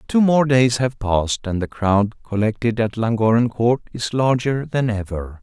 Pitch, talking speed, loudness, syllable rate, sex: 115 Hz, 175 wpm, -19 LUFS, 4.5 syllables/s, male